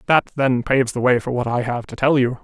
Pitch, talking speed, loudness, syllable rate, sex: 125 Hz, 295 wpm, -19 LUFS, 5.8 syllables/s, male